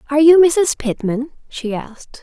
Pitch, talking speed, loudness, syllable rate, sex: 275 Hz, 160 wpm, -15 LUFS, 5.0 syllables/s, female